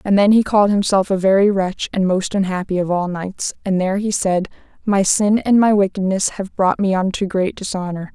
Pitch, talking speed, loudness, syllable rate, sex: 195 Hz, 215 wpm, -17 LUFS, 5.3 syllables/s, female